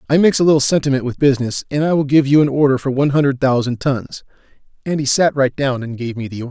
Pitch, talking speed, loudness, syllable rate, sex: 135 Hz, 265 wpm, -16 LUFS, 6.8 syllables/s, male